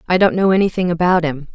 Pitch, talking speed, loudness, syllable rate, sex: 175 Hz, 235 wpm, -16 LUFS, 6.7 syllables/s, female